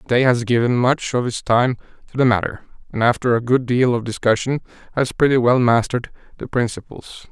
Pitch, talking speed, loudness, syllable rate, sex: 120 Hz, 190 wpm, -18 LUFS, 5.4 syllables/s, male